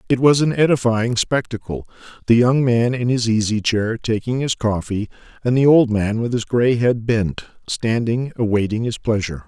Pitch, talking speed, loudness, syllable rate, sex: 115 Hz, 175 wpm, -18 LUFS, 4.9 syllables/s, male